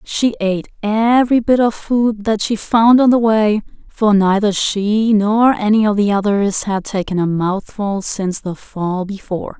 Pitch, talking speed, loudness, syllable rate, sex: 210 Hz, 175 wpm, -15 LUFS, 4.3 syllables/s, female